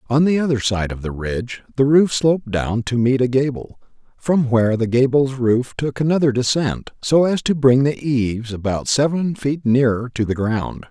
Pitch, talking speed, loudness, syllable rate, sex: 130 Hz, 200 wpm, -18 LUFS, 4.9 syllables/s, male